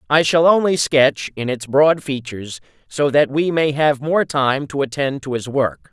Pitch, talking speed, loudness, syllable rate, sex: 140 Hz, 205 wpm, -17 LUFS, 4.5 syllables/s, male